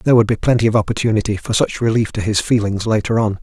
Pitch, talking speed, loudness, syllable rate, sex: 110 Hz, 245 wpm, -17 LUFS, 6.8 syllables/s, male